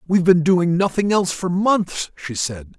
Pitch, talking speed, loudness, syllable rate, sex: 175 Hz, 195 wpm, -19 LUFS, 4.8 syllables/s, male